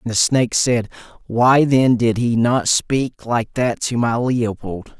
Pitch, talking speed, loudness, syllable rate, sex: 120 Hz, 180 wpm, -17 LUFS, 3.8 syllables/s, male